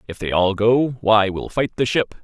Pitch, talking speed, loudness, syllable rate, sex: 110 Hz, 240 wpm, -19 LUFS, 4.5 syllables/s, male